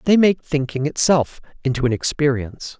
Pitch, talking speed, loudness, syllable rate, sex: 145 Hz, 150 wpm, -19 LUFS, 5.4 syllables/s, male